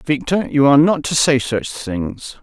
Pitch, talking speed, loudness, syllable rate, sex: 140 Hz, 200 wpm, -16 LUFS, 4.5 syllables/s, male